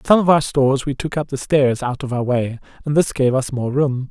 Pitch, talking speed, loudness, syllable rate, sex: 135 Hz, 280 wpm, -18 LUFS, 5.4 syllables/s, male